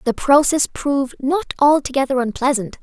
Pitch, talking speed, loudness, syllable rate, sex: 270 Hz, 125 wpm, -17 LUFS, 5.1 syllables/s, female